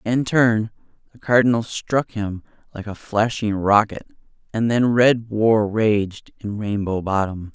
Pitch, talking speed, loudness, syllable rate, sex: 110 Hz, 145 wpm, -20 LUFS, 3.8 syllables/s, male